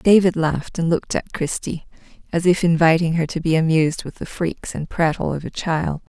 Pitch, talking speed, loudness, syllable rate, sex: 165 Hz, 205 wpm, -20 LUFS, 5.4 syllables/s, female